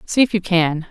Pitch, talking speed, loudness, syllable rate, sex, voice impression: 185 Hz, 265 wpm, -17 LUFS, 5.0 syllables/s, female, feminine, very adult-like, slightly intellectual, calm, slightly strict